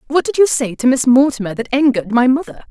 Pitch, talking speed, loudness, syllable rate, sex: 260 Hz, 245 wpm, -15 LUFS, 6.5 syllables/s, female